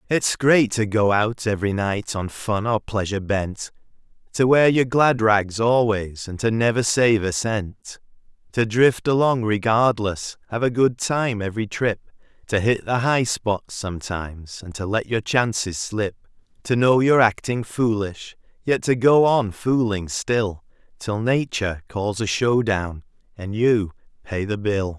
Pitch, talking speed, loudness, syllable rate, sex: 110 Hz, 165 wpm, -21 LUFS, 4.2 syllables/s, male